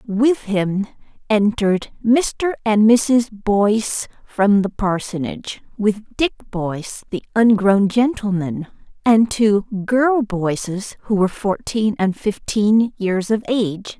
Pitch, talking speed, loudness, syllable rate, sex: 210 Hz, 120 wpm, -18 LUFS, 3.8 syllables/s, female